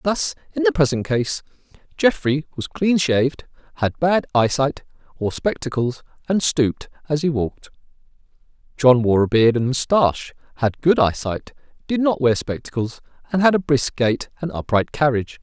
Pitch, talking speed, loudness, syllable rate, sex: 140 Hz, 155 wpm, -20 LUFS, 5.0 syllables/s, male